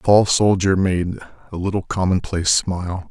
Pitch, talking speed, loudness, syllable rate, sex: 95 Hz, 155 wpm, -19 LUFS, 5.2 syllables/s, male